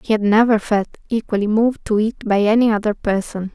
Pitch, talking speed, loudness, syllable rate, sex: 215 Hz, 205 wpm, -18 LUFS, 5.9 syllables/s, female